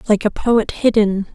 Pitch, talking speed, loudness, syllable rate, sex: 215 Hz, 180 wpm, -16 LUFS, 4.5 syllables/s, female